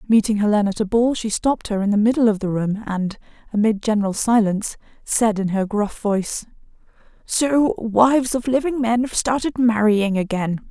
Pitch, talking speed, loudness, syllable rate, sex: 220 Hz, 180 wpm, -20 LUFS, 5.3 syllables/s, female